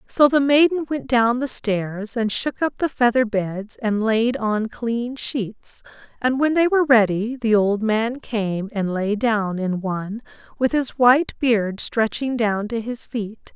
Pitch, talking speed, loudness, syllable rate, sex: 230 Hz, 180 wpm, -21 LUFS, 3.8 syllables/s, female